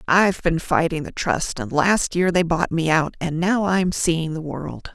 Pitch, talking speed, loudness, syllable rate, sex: 170 Hz, 220 wpm, -21 LUFS, 4.2 syllables/s, female